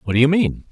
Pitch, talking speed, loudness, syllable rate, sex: 140 Hz, 340 wpm, -17 LUFS, 7.3 syllables/s, male